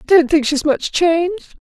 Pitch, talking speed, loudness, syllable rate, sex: 325 Hz, 220 wpm, -16 LUFS, 4.6 syllables/s, female